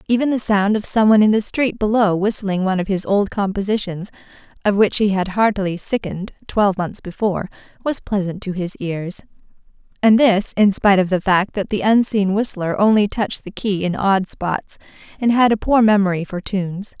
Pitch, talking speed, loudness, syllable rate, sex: 200 Hz, 190 wpm, -18 LUFS, 5.4 syllables/s, female